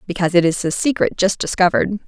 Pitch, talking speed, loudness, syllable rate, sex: 185 Hz, 200 wpm, -17 LUFS, 6.9 syllables/s, female